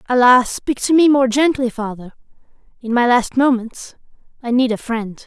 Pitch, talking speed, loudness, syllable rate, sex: 245 Hz, 170 wpm, -16 LUFS, 4.8 syllables/s, female